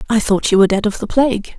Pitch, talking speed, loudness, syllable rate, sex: 215 Hz, 305 wpm, -15 LUFS, 7.4 syllables/s, female